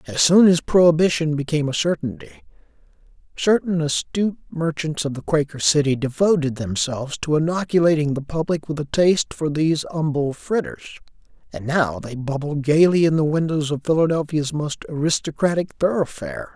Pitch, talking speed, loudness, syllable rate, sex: 155 Hz, 145 wpm, -20 LUFS, 5.5 syllables/s, male